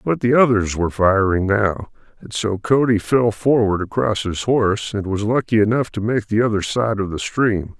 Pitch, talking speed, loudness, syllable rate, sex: 110 Hz, 200 wpm, -18 LUFS, 4.9 syllables/s, male